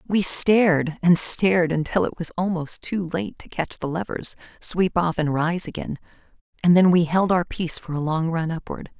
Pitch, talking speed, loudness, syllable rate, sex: 170 Hz, 200 wpm, -22 LUFS, 4.9 syllables/s, female